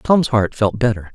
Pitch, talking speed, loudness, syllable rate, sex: 115 Hz, 210 wpm, -17 LUFS, 4.5 syllables/s, male